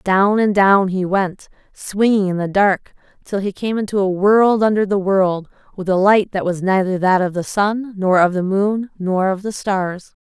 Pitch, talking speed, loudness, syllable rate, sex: 195 Hz, 210 wpm, -17 LUFS, 4.3 syllables/s, female